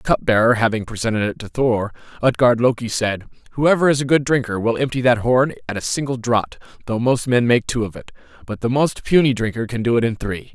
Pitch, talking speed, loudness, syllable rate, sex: 120 Hz, 230 wpm, -19 LUFS, 5.8 syllables/s, male